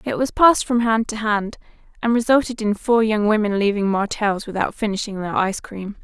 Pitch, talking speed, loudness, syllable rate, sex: 215 Hz, 200 wpm, -20 LUFS, 5.5 syllables/s, female